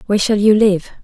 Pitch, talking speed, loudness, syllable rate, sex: 205 Hz, 230 wpm, -14 LUFS, 6.6 syllables/s, female